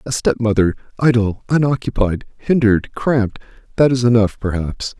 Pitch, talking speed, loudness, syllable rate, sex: 115 Hz, 110 wpm, -17 LUFS, 5.2 syllables/s, male